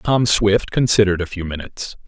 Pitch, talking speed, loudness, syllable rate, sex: 100 Hz, 175 wpm, -18 LUFS, 5.6 syllables/s, male